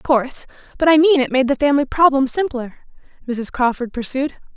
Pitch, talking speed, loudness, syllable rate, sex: 270 Hz, 185 wpm, -17 LUFS, 5.8 syllables/s, female